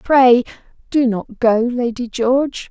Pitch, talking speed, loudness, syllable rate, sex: 245 Hz, 135 wpm, -16 LUFS, 3.7 syllables/s, female